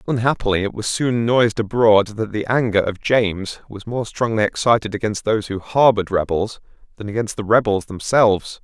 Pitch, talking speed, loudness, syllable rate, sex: 110 Hz, 175 wpm, -19 LUFS, 5.5 syllables/s, male